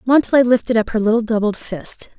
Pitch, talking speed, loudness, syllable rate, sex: 230 Hz, 195 wpm, -17 LUFS, 6.0 syllables/s, female